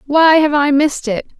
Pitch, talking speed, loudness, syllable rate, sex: 290 Hz, 215 wpm, -13 LUFS, 5.2 syllables/s, female